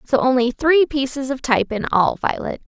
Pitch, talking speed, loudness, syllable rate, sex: 265 Hz, 195 wpm, -19 LUFS, 5.2 syllables/s, female